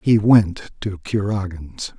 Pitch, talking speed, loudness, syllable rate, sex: 100 Hz, 120 wpm, -19 LUFS, 3.7 syllables/s, male